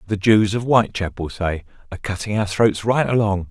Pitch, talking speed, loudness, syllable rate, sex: 105 Hz, 190 wpm, -19 LUFS, 5.2 syllables/s, male